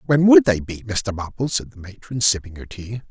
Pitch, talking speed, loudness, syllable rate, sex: 115 Hz, 230 wpm, -19 LUFS, 5.2 syllables/s, male